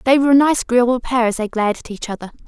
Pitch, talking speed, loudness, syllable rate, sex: 240 Hz, 290 wpm, -17 LUFS, 7.6 syllables/s, female